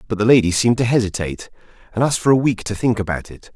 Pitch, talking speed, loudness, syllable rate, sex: 110 Hz, 255 wpm, -18 LUFS, 7.6 syllables/s, male